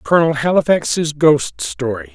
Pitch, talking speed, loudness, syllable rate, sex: 155 Hz, 110 wpm, -16 LUFS, 4.4 syllables/s, male